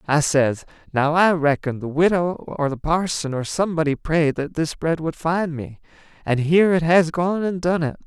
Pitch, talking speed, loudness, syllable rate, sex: 160 Hz, 200 wpm, -20 LUFS, 4.8 syllables/s, male